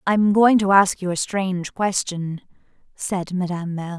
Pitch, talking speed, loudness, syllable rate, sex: 185 Hz, 165 wpm, -20 LUFS, 4.8 syllables/s, female